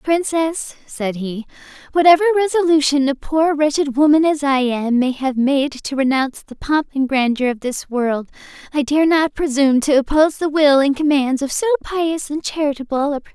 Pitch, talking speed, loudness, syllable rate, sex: 285 Hz, 185 wpm, -17 LUFS, 5.2 syllables/s, female